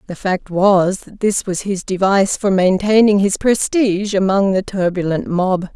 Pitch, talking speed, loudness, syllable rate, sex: 195 Hz, 165 wpm, -16 LUFS, 4.5 syllables/s, female